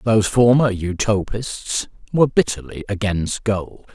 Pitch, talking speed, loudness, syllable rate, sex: 105 Hz, 105 wpm, -19 LUFS, 4.4 syllables/s, male